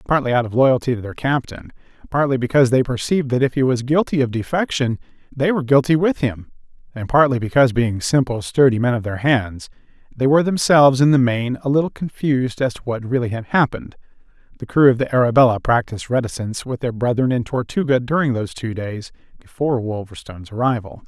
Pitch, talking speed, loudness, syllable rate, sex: 125 Hz, 190 wpm, -18 LUFS, 6.2 syllables/s, male